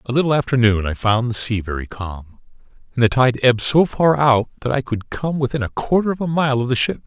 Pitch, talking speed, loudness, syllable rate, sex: 125 Hz, 255 wpm, -18 LUFS, 5.8 syllables/s, male